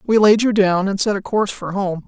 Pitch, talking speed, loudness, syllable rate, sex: 200 Hz, 290 wpm, -17 LUFS, 5.6 syllables/s, female